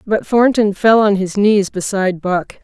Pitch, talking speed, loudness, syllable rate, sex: 200 Hz, 180 wpm, -14 LUFS, 4.4 syllables/s, female